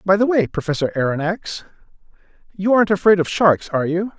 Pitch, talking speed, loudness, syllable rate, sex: 185 Hz, 170 wpm, -18 LUFS, 6.1 syllables/s, male